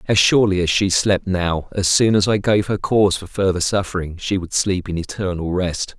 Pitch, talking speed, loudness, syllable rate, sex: 95 Hz, 220 wpm, -18 LUFS, 5.2 syllables/s, male